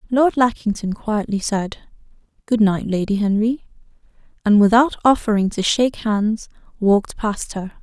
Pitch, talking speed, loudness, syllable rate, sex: 215 Hz, 130 wpm, -19 LUFS, 4.6 syllables/s, female